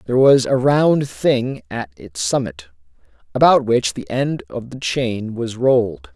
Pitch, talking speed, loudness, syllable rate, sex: 115 Hz, 165 wpm, -18 LUFS, 4.0 syllables/s, male